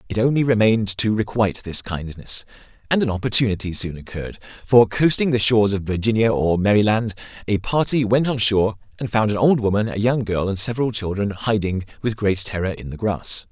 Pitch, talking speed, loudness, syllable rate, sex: 105 Hz, 190 wpm, -20 LUFS, 5.8 syllables/s, male